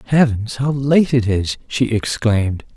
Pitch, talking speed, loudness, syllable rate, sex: 120 Hz, 150 wpm, -17 LUFS, 4.1 syllables/s, male